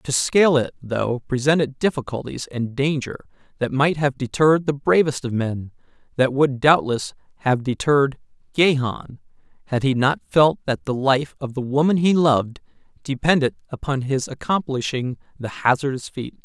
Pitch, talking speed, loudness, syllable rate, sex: 135 Hz, 145 wpm, -21 LUFS, 4.8 syllables/s, male